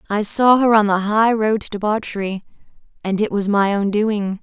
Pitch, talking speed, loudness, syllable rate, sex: 210 Hz, 205 wpm, -17 LUFS, 5.0 syllables/s, female